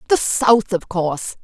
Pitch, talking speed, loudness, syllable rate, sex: 195 Hz, 165 wpm, -18 LUFS, 4.2 syllables/s, female